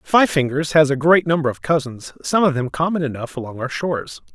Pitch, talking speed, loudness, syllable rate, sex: 150 Hz, 220 wpm, -19 LUFS, 5.7 syllables/s, male